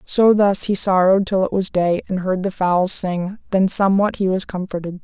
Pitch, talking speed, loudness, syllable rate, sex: 190 Hz, 215 wpm, -18 LUFS, 5.1 syllables/s, female